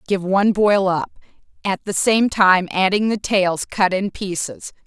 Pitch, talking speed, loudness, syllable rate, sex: 195 Hz, 175 wpm, -18 LUFS, 4.2 syllables/s, female